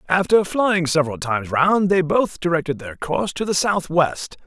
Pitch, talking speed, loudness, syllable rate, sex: 170 Hz, 175 wpm, -19 LUFS, 5.0 syllables/s, male